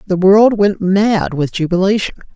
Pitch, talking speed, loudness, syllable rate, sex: 195 Hz, 155 wpm, -13 LUFS, 4.4 syllables/s, female